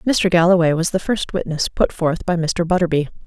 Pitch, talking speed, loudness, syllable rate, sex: 175 Hz, 200 wpm, -18 LUFS, 5.4 syllables/s, female